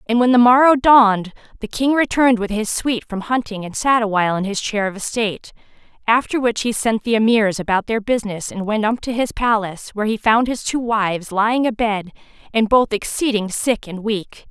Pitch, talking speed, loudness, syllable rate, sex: 220 Hz, 210 wpm, -18 LUFS, 5.6 syllables/s, female